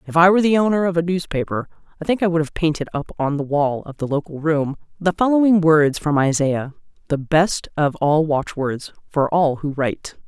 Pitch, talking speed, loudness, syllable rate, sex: 160 Hz, 210 wpm, -19 LUFS, 5.3 syllables/s, female